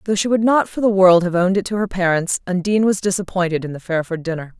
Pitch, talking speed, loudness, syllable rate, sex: 185 Hz, 260 wpm, -18 LUFS, 6.6 syllables/s, female